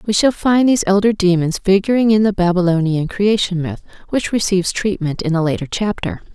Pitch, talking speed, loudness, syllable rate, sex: 190 Hz, 180 wpm, -16 LUFS, 5.7 syllables/s, female